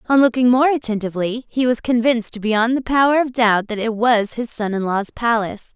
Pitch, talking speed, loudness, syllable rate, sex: 235 Hz, 210 wpm, -18 LUFS, 5.5 syllables/s, female